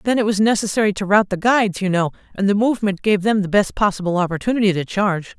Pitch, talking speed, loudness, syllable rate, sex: 200 Hz, 235 wpm, -18 LUFS, 6.8 syllables/s, female